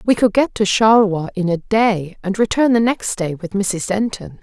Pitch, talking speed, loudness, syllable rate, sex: 205 Hz, 215 wpm, -17 LUFS, 4.8 syllables/s, female